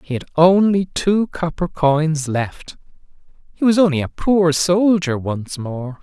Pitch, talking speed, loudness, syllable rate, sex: 165 Hz, 150 wpm, -17 LUFS, 3.7 syllables/s, male